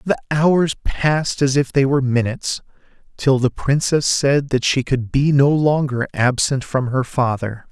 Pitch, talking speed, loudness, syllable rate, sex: 135 Hz, 170 wpm, -18 LUFS, 4.3 syllables/s, male